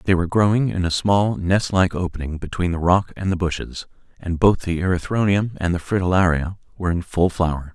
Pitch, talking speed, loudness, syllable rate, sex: 90 Hz, 195 wpm, -20 LUFS, 5.9 syllables/s, male